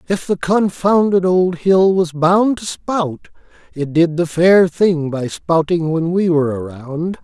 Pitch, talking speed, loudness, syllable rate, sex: 170 Hz, 165 wpm, -16 LUFS, 3.8 syllables/s, male